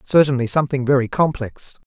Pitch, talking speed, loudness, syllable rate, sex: 135 Hz, 130 wpm, -18 LUFS, 5.9 syllables/s, male